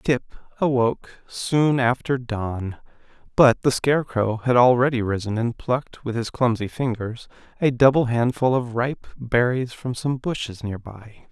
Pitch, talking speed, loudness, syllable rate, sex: 120 Hz, 150 wpm, -22 LUFS, 4.4 syllables/s, male